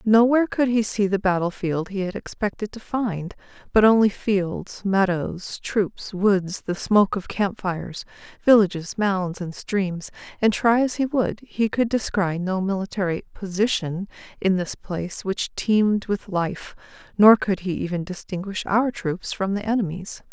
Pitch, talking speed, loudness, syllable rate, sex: 200 Hz, 155 wpm, -23 LUFS, 4.4 syllables/s, female